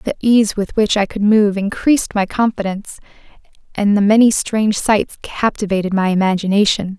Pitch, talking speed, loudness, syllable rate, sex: 205 Hz, 155 wpm, -16 LUFS, 5.2 syllables/s, female